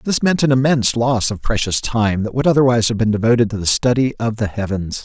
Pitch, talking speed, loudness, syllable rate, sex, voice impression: 115 Hz, 240 wpm, -17 LUFS, 6.1 syllables/s, male, very masculine, middle-aged, thick, tensed, slightly powerful, bright, soft, clear, fluent, slightly raspy, very cool, very intellectual, slightly refreshing, sincere, very calm, very mature, very friendly, very reassuring, very unique, elegant, slightly wild, sweet, lively, kind, slightly modest, slightly light